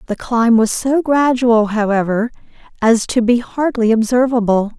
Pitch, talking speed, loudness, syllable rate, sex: 235 Hz, 140 wpm, -15 LUFS, 4.4 syllables/s, female